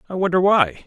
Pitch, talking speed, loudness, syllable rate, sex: 175 Hz, 210 wpm, -18 LUFS, 5.8 syllables/s, male